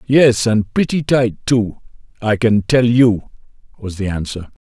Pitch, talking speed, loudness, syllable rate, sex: 115 Hz, 155 wpm, -16 LUFS, 4.1 syllables/s, male